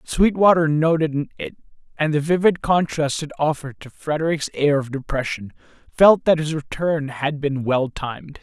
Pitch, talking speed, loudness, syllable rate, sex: 150 Hz, 155 wpm, -20 LUFS, 4.8 syllables/s, male